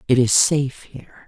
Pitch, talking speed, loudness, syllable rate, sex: 130 Hz, 190 wpm, -17 LUFS, 5.6 syllables/s, female